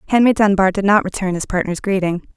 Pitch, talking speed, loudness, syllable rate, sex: 195 Hz, 205 wpm, -17 LUFS, 6.3 syllables/s, female